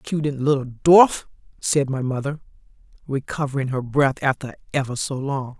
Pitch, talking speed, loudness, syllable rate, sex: 140 Hz, 140 wpm, -21 LUFS, 5.3 syllables/s, female